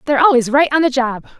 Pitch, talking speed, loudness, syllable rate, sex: 270 Hz, 260 wpm, -14 LUFS, 7.1 syllables/s, female